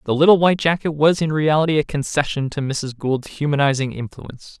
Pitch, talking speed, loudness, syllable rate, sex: 145 Hz, 185 wpm, -19 LUFS, 5.9 syllables/s, male